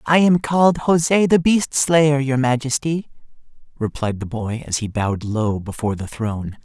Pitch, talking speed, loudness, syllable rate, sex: 135 Hz, 170 wpm, -19 LUFS, 4.6 syllables/s, male